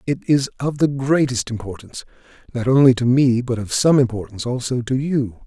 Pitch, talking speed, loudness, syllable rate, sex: 125 Hz, 185 wpm, -19 LUFS, 5.6 syllables/s, male